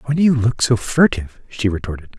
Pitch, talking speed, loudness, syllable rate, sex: 120 Hz, 220 wpm, -18 LUFS, 6.3 syllables/s, male